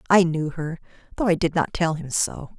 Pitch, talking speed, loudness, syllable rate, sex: 165 Hz, 230 wpm, -23 LUFS, 5.1 syllables/s, female